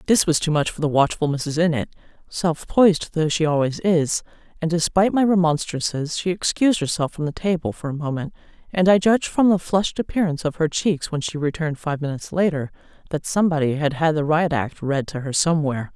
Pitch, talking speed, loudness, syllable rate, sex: 160 Hz, 205 wpm, -21 LUFS, 6.0 syllables/s, female